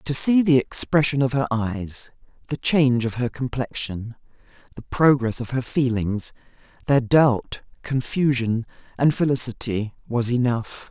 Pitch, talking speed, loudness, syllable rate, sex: 125 Hz, 130 wpm, -21 LUFS, 4.3 syllables/s, female